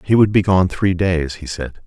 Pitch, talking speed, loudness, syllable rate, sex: 90 Hz, 260 wpm, -17 LUFS, 4.7 syllables/s, male